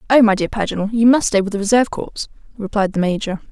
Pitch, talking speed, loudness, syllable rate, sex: 210 Hz, 240 wpm, -17 LUFS, 6.8 syllables/s, female